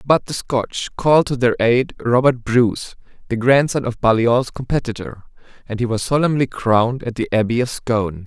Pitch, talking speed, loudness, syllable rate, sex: 120 Hz, 175 wpm, -18 LUFS, 5.1 syllables/s, male